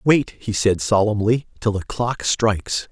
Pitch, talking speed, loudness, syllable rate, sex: 110 Hz, 165 wpm, -20 LUFS, 4.1 syllables/s, male